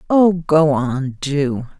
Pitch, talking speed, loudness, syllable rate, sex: 150 Hz, 135 wpm, -17 LUFS, 2.7 syllables/s, female